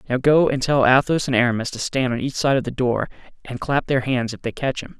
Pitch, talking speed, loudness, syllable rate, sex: 130 Hz, 275 wpm, -20 LUFS, 6.0 syllables/s, male